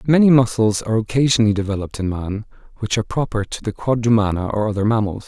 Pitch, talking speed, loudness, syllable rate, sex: 110 Hz, 180 wpm, -19 LUFS, 6.9 syllables/s, male